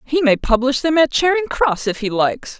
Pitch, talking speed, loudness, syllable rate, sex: 275 Hz, 230 wpm, -17 LUFS, 5.2 syllables/s, female